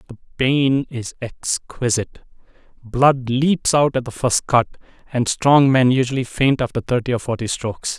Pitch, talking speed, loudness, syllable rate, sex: 125 Hz, 160 wpm, -19 LUFS, 4.6 syllables/s, male